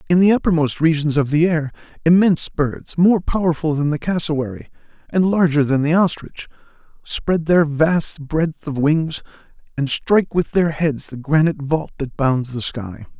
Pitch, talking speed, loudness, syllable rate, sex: 155 Hz, 170 wpm, -18 LUFS, 4.7 syllables/s, male